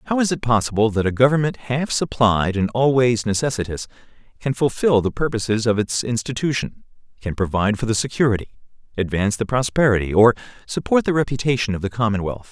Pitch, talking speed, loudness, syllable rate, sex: 115 Hz, 165 wpm, -20 LUFS, 6.1 syllables/s, male